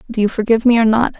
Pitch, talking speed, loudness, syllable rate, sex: 225 Hz, 300 wpm, -14 LUFS, 8.1 syllables/s, female